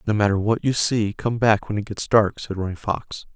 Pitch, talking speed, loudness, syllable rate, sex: 105 Hz, 250 wpm, -22 LUFS, 5.1 syllables/s, male